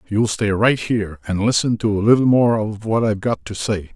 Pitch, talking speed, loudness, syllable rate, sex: 105 Hz, 245 wpm, -18 LUFS, 5.6 syllables/s, male